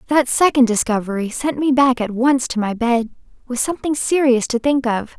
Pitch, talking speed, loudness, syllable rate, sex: 250 Hz, 185 wpm, -18 LUFS, 5.2 syllables/s, female